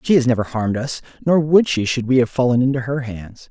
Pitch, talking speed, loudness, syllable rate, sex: 130 Hz, 255 wpm, -18 LUFS, 6.0 syllables/s, male